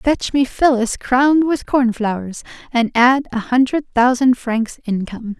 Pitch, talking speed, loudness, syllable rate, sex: 250 Hz, 155 wpm, -17 LUFS, 4.3 syllables/s, female